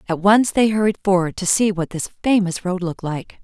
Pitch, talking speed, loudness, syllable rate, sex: 190 Hz, 225 wpm, -19 LUFS, 5.7 syllables/s, female